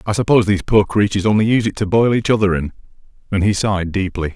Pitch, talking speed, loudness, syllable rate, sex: 100 Hz, 235 wpm, -16 LUFS, 7.4 syllables/s, male